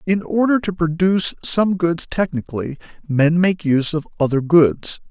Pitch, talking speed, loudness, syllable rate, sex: 165 Hz, 155 wpm, -18 LUFS, 4.8 syllables/s, male